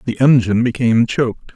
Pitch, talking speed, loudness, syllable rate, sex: 120 Hz, 155 wpm, -15 LUFS, 6.4 syllables/s, male